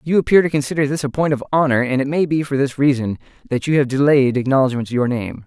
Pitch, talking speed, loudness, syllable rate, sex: 140 Hz, 255 wpm, -17 LUFS, 6.5 syllables/s, male